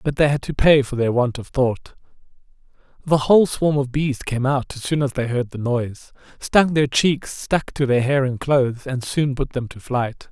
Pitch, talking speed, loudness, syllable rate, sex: 135 Hz, 225 wpm, -20 LUFS, 4.8 syllables/s, male